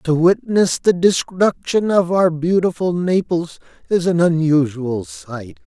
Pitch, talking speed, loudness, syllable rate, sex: 170 Hz, 125 wpm, -17 LUFS, 3.8 syllables/s, male